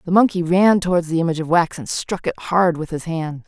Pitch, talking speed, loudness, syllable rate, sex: 170 Hz, 260 wpm, -19 LUFS, 5.8 syllables/s, female